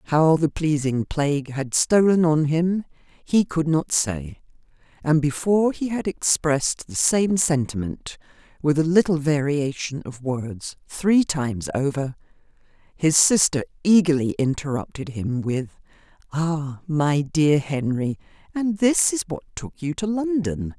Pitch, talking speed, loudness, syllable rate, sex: 155 Hz, 135 wpm, -22 LUFS, 4.1 syllables/s, female